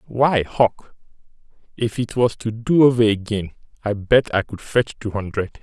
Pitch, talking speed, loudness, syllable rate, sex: 110 Hz, 170 wpm, -20 LUFS, 4.4 syllables/s, male